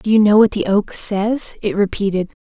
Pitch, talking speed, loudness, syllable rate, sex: 205 Hz, 220 wpm, -16 LUFS, 4.9 syllables/s, female